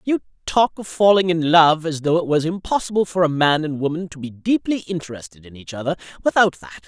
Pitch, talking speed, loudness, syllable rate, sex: 160 Hz, 220 wpm, -19 LUFS, 5.9 syllables/s, male